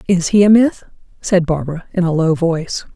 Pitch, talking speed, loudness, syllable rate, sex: 175 Hz, 205 wpm, -15 LUFS, 5.6 syllables/s, female